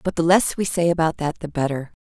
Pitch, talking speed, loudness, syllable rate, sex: 165 Hz, 265 wpm, -21 LUFS, 5.9 syllables/s, female